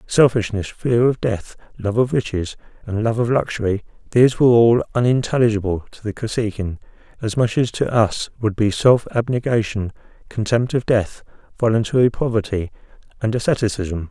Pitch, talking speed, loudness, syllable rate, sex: 110 Hz, 145 wpm, -19 LUFS, 5.2 syllables/s, male